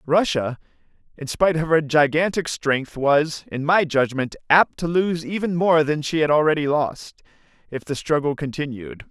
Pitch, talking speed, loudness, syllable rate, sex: 155 Hz, 165 wpm, -21 LUFS, 4.6 syllables/s, male